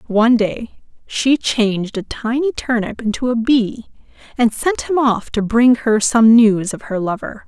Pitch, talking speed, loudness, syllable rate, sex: 230 Hz, 175 wpm, -16 LUFS, 4.3 syllables/s, female